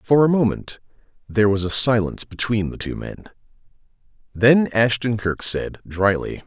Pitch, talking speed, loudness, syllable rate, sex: 110 Hz, 150 wpm, -20 LUFS, 4.8 syllables/s, male